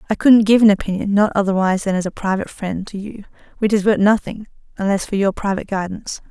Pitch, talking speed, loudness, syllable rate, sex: 200 Hz, 210 wpm, -17 LUFS, 6.7 syllables/s, female